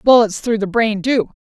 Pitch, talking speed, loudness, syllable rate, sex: 220 Hz, 210 wpm, -16 LUFS, 4.8 syllables/s, female